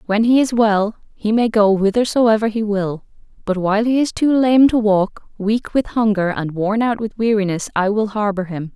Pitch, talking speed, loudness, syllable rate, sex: 215 Hz, 205 wpm, -17 LUFS, 4.9 syllables/s, female